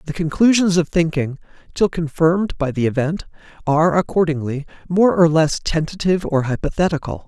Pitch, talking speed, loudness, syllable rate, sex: 160 Hz, 140 wpm, -18 LUFS, 5.5 syllables/s, male